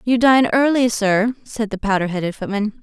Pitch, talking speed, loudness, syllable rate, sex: 220 Hz, 190 wpm, -18 LUFS, 5.4 syllables/s, female